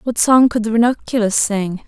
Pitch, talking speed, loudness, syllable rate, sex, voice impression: 225 Hz, 190 wpm, -15 LUFS, 4.9 syllables/s, female, feminine, slightly young, slightly bright, slightly cute, friendly